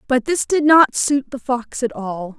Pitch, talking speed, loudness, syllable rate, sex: 255 Hz, 225 wpm, -18 LUFS, 4.0 syllables/s, female